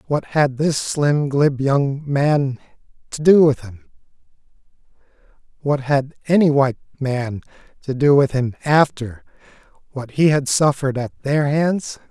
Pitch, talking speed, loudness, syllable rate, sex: 140 Hz, 140 wpm, -18 LUFS, 4.1 syllables/s, male